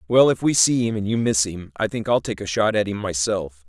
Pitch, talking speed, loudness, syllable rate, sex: 100 Hz, 295 wpm, -21 LUFS, 5.5 syllables/s, male